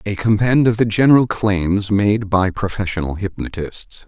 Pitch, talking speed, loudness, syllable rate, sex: 100 Hz, 145 wpm, -17 LUFS, 4.6 syllables/s, male